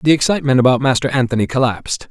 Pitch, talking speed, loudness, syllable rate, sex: 130 Hz, 170 wpm, -15 LUFS, 7.5 syllables/s, male